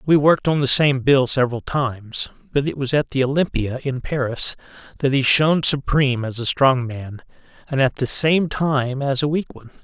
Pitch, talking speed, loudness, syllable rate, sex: 135 Hz, 190 wpm, -19 LUFS, 5.2 syllables/s, male